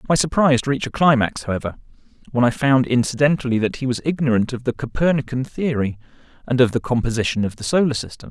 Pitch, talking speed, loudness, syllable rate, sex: 130 Hz, 190 wpm, -20 LUFS, 6.7 syllables/s, male